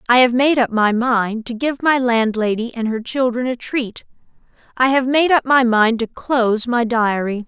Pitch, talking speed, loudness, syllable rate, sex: 240 Hz, 200 wpm, -17 LUFS, 4.6 syllables/s, female